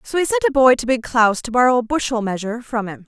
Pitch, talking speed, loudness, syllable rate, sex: 245 Hz, 290 wpm, -18 LUFS, 6.5 syllables/s, female